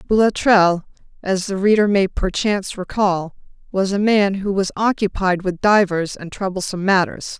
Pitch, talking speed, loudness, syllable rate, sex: 195 Hz, 145 wpm, -18 LUFS, 5.0 syllables/s, female